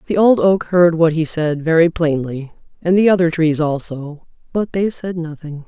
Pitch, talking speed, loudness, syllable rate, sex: 165 Hz, 190 wpm, -16 LUFS, 4.7 syllables/s, female